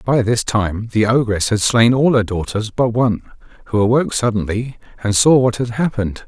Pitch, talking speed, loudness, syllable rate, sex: 115 Hz, 190 wpm, -16 LUFS, 5.2 syllables/s, male